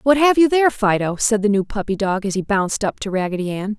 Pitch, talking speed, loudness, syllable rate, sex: 215 Hz, 270 wpm, -18 LUFS, 6.2 syllables/s, female